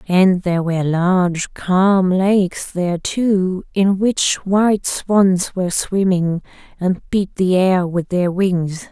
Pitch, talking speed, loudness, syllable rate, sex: 185 Hz, 140 wpm, -17 LUFS, 3.5 syllables/s, female